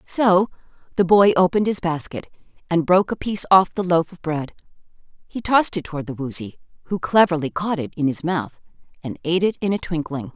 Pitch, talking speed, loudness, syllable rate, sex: 175 Hz, 195 wpm, -20 LUFS, 5.9 syllables/s, female